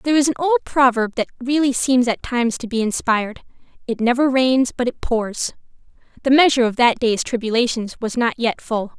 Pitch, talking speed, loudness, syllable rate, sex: 245 Hz, 195 wpm, -19 LUFS, 5.6 syllables/s, female